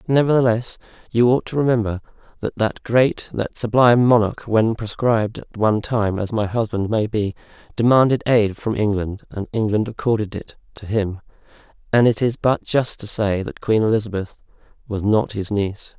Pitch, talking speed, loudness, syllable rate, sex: 110 Hz, 170 wpm, -20 LUFS, 5.1 syllables/s, male